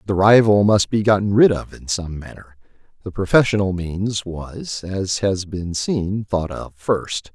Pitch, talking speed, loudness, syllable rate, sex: 100 Hz, 170 wpm, -19 LUFS, 4.0 syllables/s, male